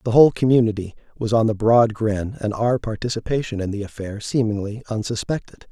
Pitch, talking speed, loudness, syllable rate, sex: 110 Hz, 170 wpm, -21 LUFS, 5.7 syllables/s, male